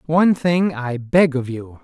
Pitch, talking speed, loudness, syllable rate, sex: 145 Hz, 195 wpm, -18 LUFS, 4.1 syllables/s, male